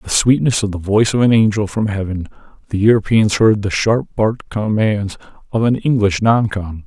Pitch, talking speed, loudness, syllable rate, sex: 105 Hz, 190 wpm, -16 LUFS, 5.3 syllables/s, male